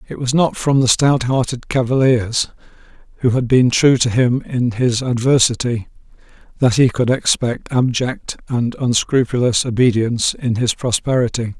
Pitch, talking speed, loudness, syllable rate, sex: 125 Hz, 140 wpm, -16 LUFS, 4.6 syllables/s, male